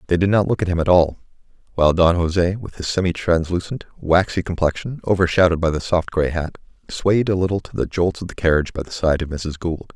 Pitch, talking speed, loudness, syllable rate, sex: 85 Hz, 230 wpm, -20 LUFS, 6.0 syllables/s, male